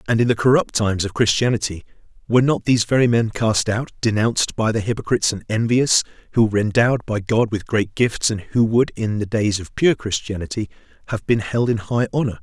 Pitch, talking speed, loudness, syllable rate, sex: 110 Hz, 210 wpm, -19 LUFS, 5.9 syllables/s, male